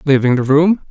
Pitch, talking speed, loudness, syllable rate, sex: 145 Hz, 200 wpm, -13 LUFS, 5.2 syllables/s, male